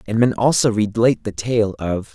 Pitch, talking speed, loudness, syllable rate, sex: 110 Hz, 195 wpm, -18 LUFS, 5.0 syllables/s, male